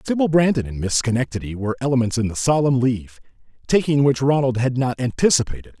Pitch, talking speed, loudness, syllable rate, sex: 130 Hz, 175 wpm, -20 LUFS, 6.5 syllables/s, male